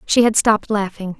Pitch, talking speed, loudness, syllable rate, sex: 210 Hz, 200 wpm, -17 LUFS, 5.6 syllables/s, female